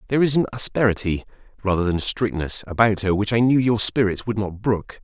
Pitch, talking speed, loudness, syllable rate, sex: 105 Hz, 205 wpm, -21 LUFS, 5.8 syllables/s, male